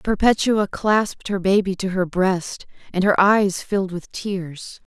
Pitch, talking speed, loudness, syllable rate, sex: 195 Hz, 155 wpm, -20 LUFS, 4.0 syllables/s, female